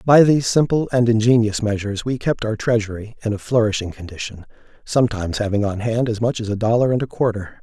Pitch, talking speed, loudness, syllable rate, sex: 115 Hz, 205 wpm, -19 LUFS, 6.2 syllables/s, male